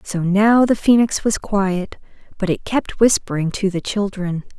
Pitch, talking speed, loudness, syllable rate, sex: 200 Hz, 170 wpm, -18 LUFS, 4.3 syllables/s, female